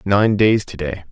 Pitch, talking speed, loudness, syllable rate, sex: 95 Hz, 215 wpm, -17 LUFS, 5.3 syllables/s, male